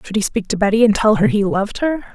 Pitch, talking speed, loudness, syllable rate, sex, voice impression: 215 Hz, 310 wpm, -16 LUFS, 6.8 syllables/s, female, feminine, slightly gender-neutral, slightly young, slightly adult-like, very thin, slightly tensed, slightly weak, slightly dark, slightly soft, clear, slightly halting, slightly raspy, cute, slightly intellectual, refreshing, very sincere, slightly calm, very friendly, reassuring, very unique, elegant, slightly wild, sweet, slightly lively, kind, slightly intense, slightly sharp, modest